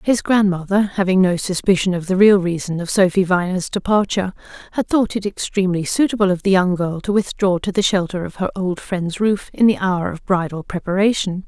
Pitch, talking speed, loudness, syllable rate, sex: 190 Hz, 200 wpm, -18 LUFS, 5.5 syllables/s, female